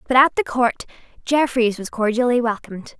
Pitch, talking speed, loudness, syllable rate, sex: 240 Hz, 160 wpm, -19 LUFS, 5.3 syllables/s, female